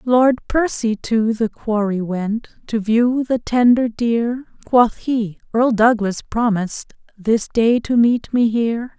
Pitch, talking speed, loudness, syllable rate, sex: 230 Hz, 145 wpm, -18 LUFS, 3.9 syllables/s, female